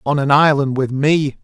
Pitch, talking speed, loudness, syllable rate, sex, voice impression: 140 Hz, 210 wpm, -15 LUFS, 4.6 syllables/s, male, masculine, adult-like, tensed, powerful, bright, clear, fluent, slightly friendly, wild, lively, slightly strict, intense, slightly sharp